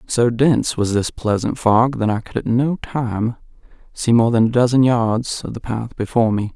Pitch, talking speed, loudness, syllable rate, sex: 115 Hz, 210 wpm, -18 LUFS, 4.8 syllables/s, male